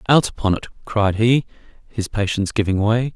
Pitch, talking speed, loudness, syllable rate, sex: 110 Hz, 170 wpm, -20 LUFS, 5.4 syllables/s, male